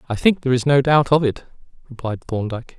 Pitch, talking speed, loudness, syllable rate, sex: 130 Hz, 215 wpm, -19 LUFS, 6.4 syllables/s, male